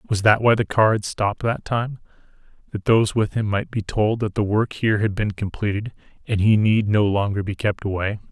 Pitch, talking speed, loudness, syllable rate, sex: 105 Hz, 215 wpm, -21 LUFS, 5.3 syllables/s, male